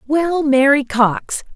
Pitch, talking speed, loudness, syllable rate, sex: 280 Hz, 115 wpm, -15 LUFS, 3.0 syllables/s, female